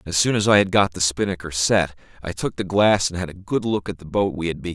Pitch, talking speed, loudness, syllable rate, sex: 95 Hz, 315 wpm, -21 LUFS, 6.4 syllables/s, male